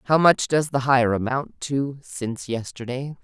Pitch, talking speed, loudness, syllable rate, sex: 130 Hz, 165 wpm, -23 LUFS, 4.4 syllables/s, female